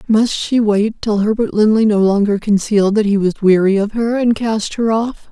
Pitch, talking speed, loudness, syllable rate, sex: 215 Hz, 215 wpm, -15 LUFS, 4.9 syllables/s, female